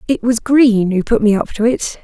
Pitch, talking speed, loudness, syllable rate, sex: 225 Hz, 265 wpm, -14 LUFS, 4.9 syllables/s, female